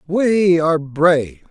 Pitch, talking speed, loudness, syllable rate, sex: 165 Hz, 120 wpm, -16 LUFS, 3.9 syllables/s, male